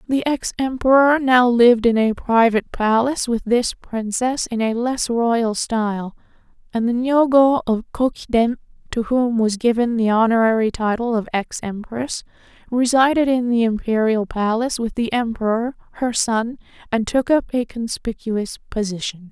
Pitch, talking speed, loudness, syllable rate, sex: 235 Hz, 150 wpm, -19 LUFS, 4.7 syllables/s, female